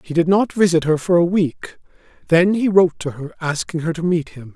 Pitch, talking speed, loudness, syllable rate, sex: 170 Hz, 235 wpm, -18 LUFS, 5.8 syllables/s, male